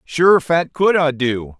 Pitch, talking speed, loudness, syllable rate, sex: 150 Hz, 190 wpm, -16 LUFS, 3.4 syllables/s, male